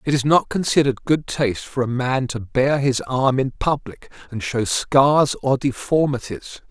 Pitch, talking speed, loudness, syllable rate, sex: 130 Hz, 180 wpm, -20 LUFS, 4.4 syllables/s, male